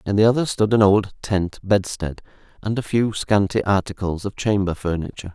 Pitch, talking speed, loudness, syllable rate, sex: 100 Hz, 180 wpm, -21 LUFS, 5.3 syllables/s, male